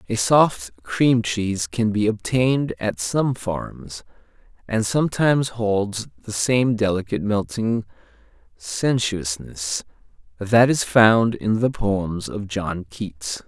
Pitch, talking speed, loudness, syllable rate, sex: 105 Hz, 120 wpm, -21 LUFS, 3.5 syllables/s, male